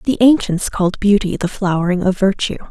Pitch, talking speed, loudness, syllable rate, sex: 195 Hz, 175 wpm, -16 LUFS, 5.7 syllables/s, female